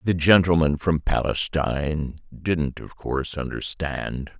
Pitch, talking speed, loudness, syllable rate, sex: 80 Hz, 110 wpm, -23 LUFS, 3.9 syllables/s, male